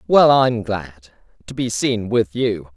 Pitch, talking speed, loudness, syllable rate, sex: 110 Hz, 150 wpm, -18 LUFS, 3.4 syllables/s, male